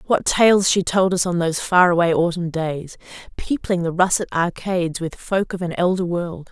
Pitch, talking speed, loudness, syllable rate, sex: 175 Hz, 195 wpm, -19 LUFS, 4.9 syllables/s, female